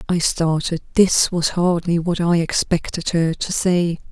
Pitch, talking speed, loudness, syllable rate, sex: 170 Hz, 160 wpm, -19 LUFS, 4.1 syllables/s, female